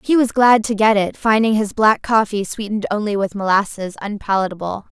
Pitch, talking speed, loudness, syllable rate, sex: 210 Hz, 180 wpm, -17 LUFS, 5.5 syllables/s, female